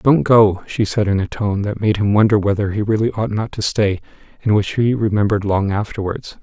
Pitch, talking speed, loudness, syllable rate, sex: 105 Hz, 225 wpm, -17 LUFS, 5.4 syllables/s, male